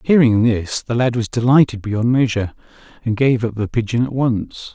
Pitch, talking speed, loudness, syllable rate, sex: 115 Hz, 190 wpm, -17 LUFS, 5.1 syllables/s, male